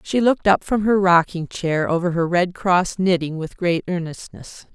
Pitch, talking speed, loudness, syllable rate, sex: 180 Hz, 190 wpm, -19 LUFS, 4.6 syllables/s, female